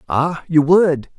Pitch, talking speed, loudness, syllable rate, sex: 160 Hz, 150 wpm, -16 LUFS, 3.3 syllables/s, male